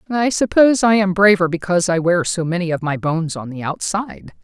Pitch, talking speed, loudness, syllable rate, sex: 175 Hz, 215 wpm, -17 LUFS, 6.0 syllables/s, female